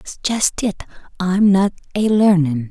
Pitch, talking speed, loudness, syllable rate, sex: 190 Hz, 135 wpm, -17 LUFS, 3.8 syllables/s, female